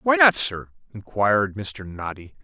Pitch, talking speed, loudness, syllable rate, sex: 125 Hz, 150 wpm, -22 LUFS, 4.2 syllables/s, male